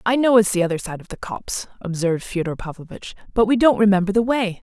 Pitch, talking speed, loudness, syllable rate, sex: 200 Hz, 230 wpm, -20 LUFS, 6.5 syllables/s, female